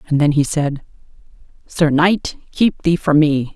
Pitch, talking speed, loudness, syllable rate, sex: 155 Hz, 170 wpm, -16 LUFS, 4.3 syllables/s, female